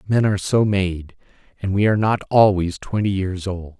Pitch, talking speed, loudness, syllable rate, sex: 95 Hz, 190 wpm, -19 LUFS, 5.1 syllables/s, male